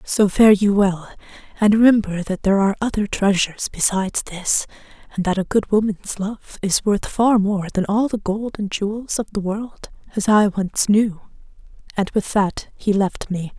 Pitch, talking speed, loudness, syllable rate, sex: 200 Hz, 180 wpm, -19 LUFS, 4.7 syllables/s, female